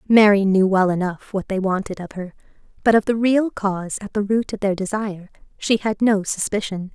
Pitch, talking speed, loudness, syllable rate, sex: 200 Hz, 205 wpm, -20 LUFS, 5.4 syllables/s, female